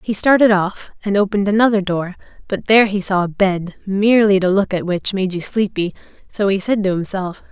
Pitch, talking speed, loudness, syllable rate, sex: 195 Hz, 210 wpm, -17 LUFS, 5.6 syllables/s, female